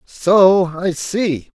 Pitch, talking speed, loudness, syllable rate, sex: 180 Hz, 115 wpm, -15 LUFS, 2.1 syllables/s, male